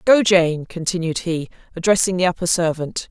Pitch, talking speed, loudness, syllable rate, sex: 175 Hz, 155 wpm, -19 LUFS, 5.1 syllables/s, female